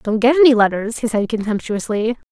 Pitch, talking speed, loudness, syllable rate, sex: 225 Hz, 180 wpm, -17 LUFS, 5.5 syllables/s, female